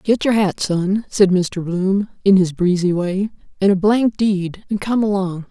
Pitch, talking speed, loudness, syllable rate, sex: 195 Hz, 195 wpm, -18 LUFS, 4.1 syllables/s, female